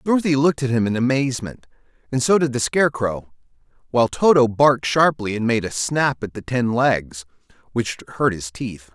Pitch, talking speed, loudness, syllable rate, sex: 125 Hz, 180 wpm, -20 LUFS, 5.5 syllables/s, male